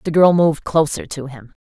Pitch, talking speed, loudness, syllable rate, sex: 155 Hz, 220 wpm, -16 LUFS, 5.5 syllables/s, female